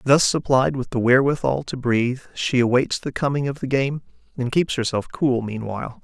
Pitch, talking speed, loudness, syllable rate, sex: 130 Hz, 190 wpm, -21 LUFS, 5.4 syllables/s, male